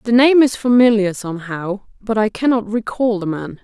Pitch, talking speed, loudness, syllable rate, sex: 215 Hz, 180 wpm, -16 LUFS, 5.0 syllables/s, female